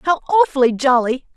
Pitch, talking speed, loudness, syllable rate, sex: 285 Hz, 130 wpm, -16 LUFS, 6.1 syllables/s, female